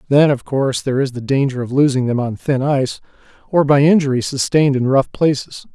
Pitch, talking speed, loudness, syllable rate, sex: 135 Hz, 210 wpm, -16 LUFS, 6.0 syllables/s, male